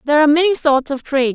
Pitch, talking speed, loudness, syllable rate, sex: 295 Hz, 265 wpm, -15 LUFS, 7.7 syllables/s, female